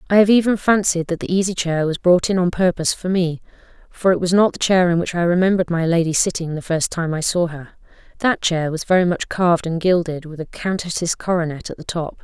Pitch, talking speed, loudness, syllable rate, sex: 175 Hz, 240 wpm, -19 LUFS, 5.9 syllables/s, female